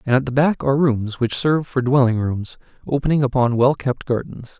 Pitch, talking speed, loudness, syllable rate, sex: 130 Hz, 210 wpm, -19 LUFS, 5.5 syllables/s, male